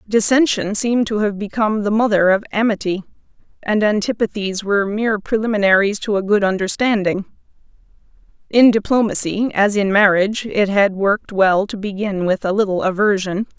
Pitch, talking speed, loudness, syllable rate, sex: 205 Hz, 145 wpm, -17 LUFS, 5.4 syllables/s, female